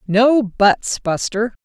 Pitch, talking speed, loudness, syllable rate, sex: 215 Hz, 110 wpm, -16 LUFS, 2.8 syllables/s, female